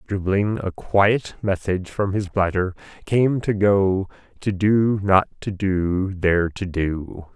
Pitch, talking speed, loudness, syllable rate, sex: 95 Hz, 145 wpm, -21 LUFS, 3.7 syllables/s, male